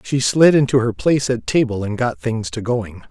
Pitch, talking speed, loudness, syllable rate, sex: 120 Hz, 230 wpm, -18 LUFS, 5.1 syllables/s, male